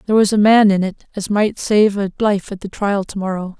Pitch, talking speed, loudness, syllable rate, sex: 200 Hz, 265 wpm, -16 LUFS, 5.5 syllables/s, female